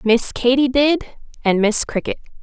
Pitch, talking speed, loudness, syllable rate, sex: 250 Hz, 150 wpm, -17 LUFS, 4.4 syllables/s, female